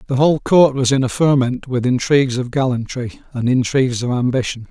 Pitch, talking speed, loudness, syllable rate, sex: 130 Hz, 190 wpm, -17 LUFS, 5.7 syllables/s, male